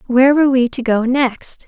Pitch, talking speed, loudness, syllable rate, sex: 255 Hz, 215 wpm, -14 LUFS, 5.3 syllables/s, female